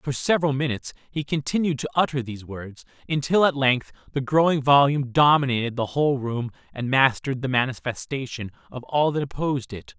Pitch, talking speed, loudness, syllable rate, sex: 135 Hz, 170 wpm, -23 LUFS, 5.9 syllables/s, male